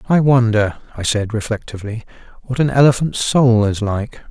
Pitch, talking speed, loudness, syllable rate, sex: 115 Hz, 155 wpm, -16 LUFS, 5.2 syllables/s, male